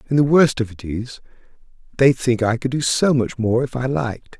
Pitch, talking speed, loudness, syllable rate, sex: 125 Hz, 230 wpm, -19 LUFS, 5.2 syllables/s, male